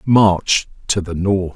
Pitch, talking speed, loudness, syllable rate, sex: 95 Hz, 155 wpm, -17 LUFS, 3.2 syllables/s, male